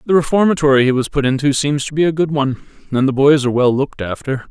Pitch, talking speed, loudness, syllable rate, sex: 140 Hz, 255 wpm, -16 LUFS, 6.9 syllables/s, male